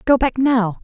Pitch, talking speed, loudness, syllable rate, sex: 245 Hz, 215 wpm, -17 LUFS, 4.5 syllables/s, female